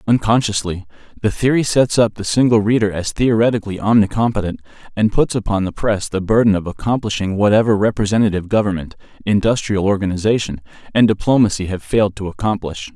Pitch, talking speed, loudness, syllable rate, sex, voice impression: 105 Hz, 145 wpm, -17 LUFS, 6.3 syllables/s, male, masculine, adult-like, tensed, powerful, clear, fluent, cool, intellectual, wild, lively, slightly light